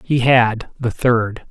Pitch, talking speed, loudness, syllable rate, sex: 120 Hz, 120 wpm, -17 LUFS, 3.1 syllables/s, male